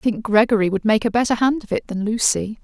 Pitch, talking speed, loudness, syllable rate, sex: 220 Hz, 275 wpm, -19 LUFS, 6.2 syllables/s, female